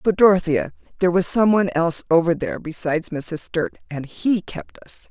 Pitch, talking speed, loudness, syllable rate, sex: 175 Hz, 190 wpm, -20 LUFS, 5.5 syllables/s, female